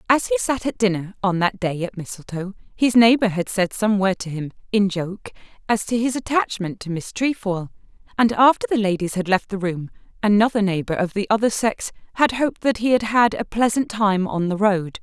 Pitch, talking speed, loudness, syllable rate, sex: 210 Hz, 210 wpm, -20 LUFS, 5.3 syllables/s, female